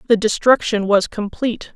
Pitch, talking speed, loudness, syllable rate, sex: 220 Hz, 135 wpm, -17 LUFS, 5.1 syllables/s, female